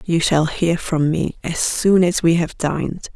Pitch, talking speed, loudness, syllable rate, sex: 165 Hz, 210 wpm, -18 LUFS, 4.1 syllables/s, female